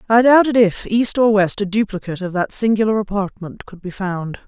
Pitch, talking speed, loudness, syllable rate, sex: 205 Hz, 200 wpm, -17 LUFS, 5.2 syllables/s, female